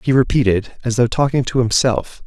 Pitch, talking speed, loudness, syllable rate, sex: 120 Hz, 185 wpm, -17 LUFS, 5.3 syllables/s, male